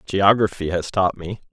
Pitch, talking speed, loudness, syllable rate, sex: 95 Hz, 160 wpm, -20 LUFS, 4.7 syllables/s, male